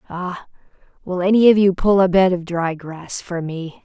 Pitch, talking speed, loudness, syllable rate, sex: 180 Hz, 205 wpm, -18 LUFS, 4.6 syllables/s, female